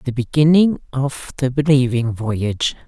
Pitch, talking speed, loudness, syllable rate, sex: 135 Hz, 125 wpm, -18 LUFS, 4.4 syllables/s, female